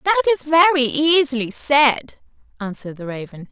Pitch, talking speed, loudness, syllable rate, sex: 275 Hz, 135 wpm, -17 LUFS, 5.0 syllables/s, female